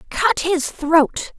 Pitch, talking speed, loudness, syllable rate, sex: 330 Hz, 130 wpm, -18 LUFS, 2.6 syllables/s, female